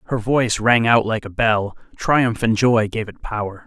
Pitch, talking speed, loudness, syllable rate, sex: 110 Hz, 215 wpm, -19 LUFS, 4.6 syllables/s, male